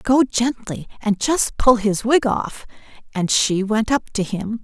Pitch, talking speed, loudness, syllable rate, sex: 225 Hz, 180 wpm, -19 LUFS, 3.8 syllables/s, female